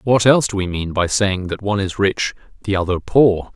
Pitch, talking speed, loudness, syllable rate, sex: 100 Hz, 235 wpm, -18 LUFS, 5.4 syllables/s, male